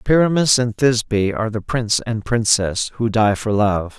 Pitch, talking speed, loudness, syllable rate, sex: 115 Hz, 180 wpm, -18 LUFS, 4.8 syllables/s, male